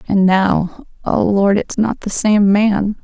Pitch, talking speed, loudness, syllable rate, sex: 205 Hz, 180 wpm, -15 LUFS, 3.4 syllables/s, female